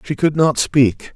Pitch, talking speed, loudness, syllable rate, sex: 140 Hz, 210 wpm, -16 LUFS, 4.0 syllables/s, male